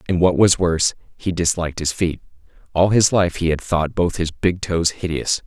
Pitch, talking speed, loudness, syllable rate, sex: 85 Hz, 210 wpm, -19 LUFS, 5.1 syllables/s, male